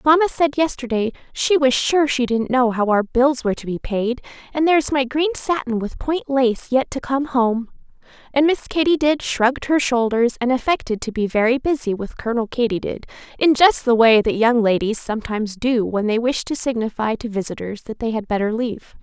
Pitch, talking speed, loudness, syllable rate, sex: 250 Hz, 210 wpm, -19 LUFS, 5.3 syllables/s, female